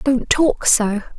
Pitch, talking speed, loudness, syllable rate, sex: 245 Hz, 150 wpm, -17 LUFS, 3.1 syllables/s, female